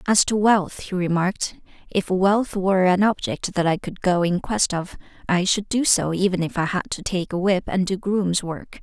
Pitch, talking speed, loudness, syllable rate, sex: 185 Hz, 225 wpm, -21 LUFS, 4.8 syllables/s, female